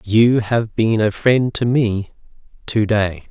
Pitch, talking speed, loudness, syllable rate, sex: 110 Hz, 165 wpm, -17 LUFS, 3.4 syllables/s, male